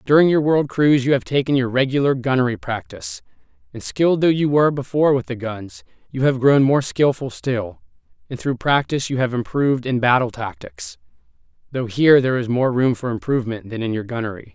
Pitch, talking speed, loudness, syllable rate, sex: 130 Hz, 195 wpm, -19 LUFS, 5.9 syllables/s, male